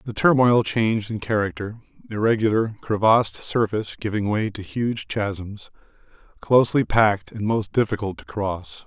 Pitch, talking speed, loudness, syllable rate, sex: 105 Hz, 135 wpm, -22 LUFS, 4.9 syllables/s, male